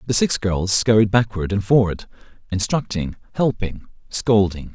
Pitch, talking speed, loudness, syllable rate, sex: 105 Hz, 125 wpm, -20 LUFS, 4.6 syllables/s, male